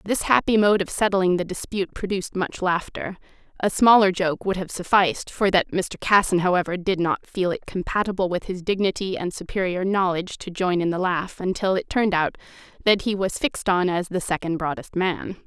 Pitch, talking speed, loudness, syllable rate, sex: 185 Hz, 195 wpm, -22 LUFS, 5.5 syllables/s, female